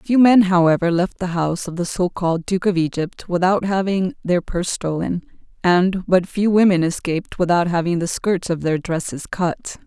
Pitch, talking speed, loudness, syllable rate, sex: 180 Hz, 180 wpm, -19 LUFS, 5.0 syllables/s, female